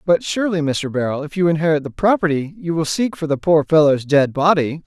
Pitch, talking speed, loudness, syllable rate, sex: 160 Hz, 220 wpm, -18 LUFS, 5.7 syllables/s, male